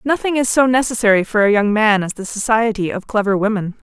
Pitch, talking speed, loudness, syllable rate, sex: 220 Hz, 215 wpm, -16 LUFS, 6.0 syllables/s, female